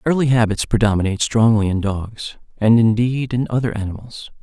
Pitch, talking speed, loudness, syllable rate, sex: 115 Hz, 150 wpm, -18 LUFS, 5.5 syllables/s, male